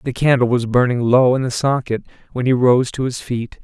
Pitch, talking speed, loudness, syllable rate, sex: 125 Hz, 230 wpm, -17 LUFS, 5.3 syllables/s, male